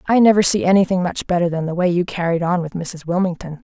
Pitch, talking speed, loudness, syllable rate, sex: 180 Hz, 245 wpm, -18 LUFS, 6.4 syllables/s, female